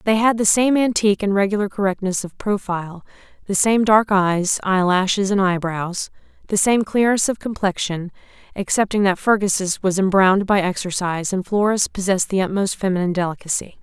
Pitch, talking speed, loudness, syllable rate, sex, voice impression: 195 Hz, 165 wpm, -19 LUFS, 5.5 syllables/s, female, feminine, adult-like, slightly fluent, slightly intellectual